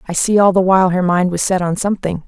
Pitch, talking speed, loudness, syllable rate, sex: 190 Hz, 290 wpm, -15 LUFS, 6.8 syllables/s, female